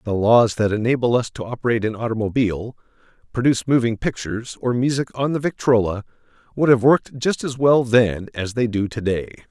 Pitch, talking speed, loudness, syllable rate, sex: 120 Hz, 175 wpm, -20 LUFS, 5.9 syllables/s, male